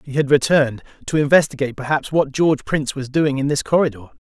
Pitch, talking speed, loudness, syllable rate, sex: 140 Hz, 195 wpm, -18 LUFS, 6.8 syllables/s, male